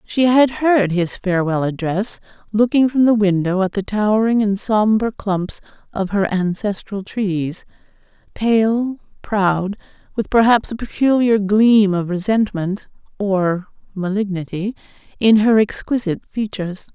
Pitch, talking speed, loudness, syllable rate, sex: 205 Hz, 115 wpm, -18 LUFS, 4.2 syllables/s, female